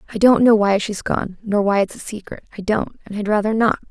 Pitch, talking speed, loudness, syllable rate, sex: 210 Hz, 245 wpm, -18 LUFS, 6.1 syllables/s, female